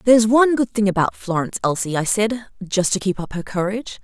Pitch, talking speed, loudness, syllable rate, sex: 205 Hz, 225 wpm, -19 LUFS, 6.0 syllables/s, female